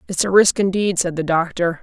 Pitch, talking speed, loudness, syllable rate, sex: 180 Hz, 230 wpm, -17 LUFS, 5.5 syllables/s, female